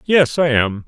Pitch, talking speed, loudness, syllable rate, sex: 140 Hz, 205 wpm, -16 LUFS, 4.0 syllables/s, male